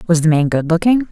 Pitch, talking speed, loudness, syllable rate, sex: 175 Hz, 270 wpm, -15 LUFS, 6.3 syllables/s, female